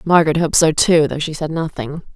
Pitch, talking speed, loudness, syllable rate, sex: 155 Hz, 225 wpm, -16 LUFS, 6.1 syllables/s, female